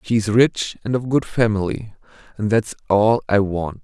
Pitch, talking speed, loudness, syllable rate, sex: 110 Hz, 190 wpm, -19 LUFS, 4.6 syllables/s, male